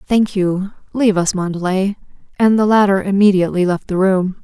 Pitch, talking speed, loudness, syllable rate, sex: 195 Hz, 160 wpm, -16 LUFS, 5.4 syllables/s, female